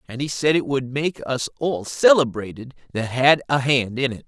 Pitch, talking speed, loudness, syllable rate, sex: 135 Hz, 210 wpm, -21 LUFS, 4.8 syllables/s, male